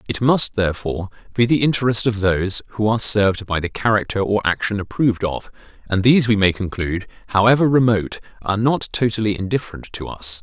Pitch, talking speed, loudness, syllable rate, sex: 105 Hz, 180 wpm, -19 LUFS, 6.4 syllables/s, male